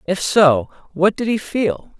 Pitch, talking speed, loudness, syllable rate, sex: 180 Hz, 180 wpm, -17 LUFS, 3.7 syllables/s, male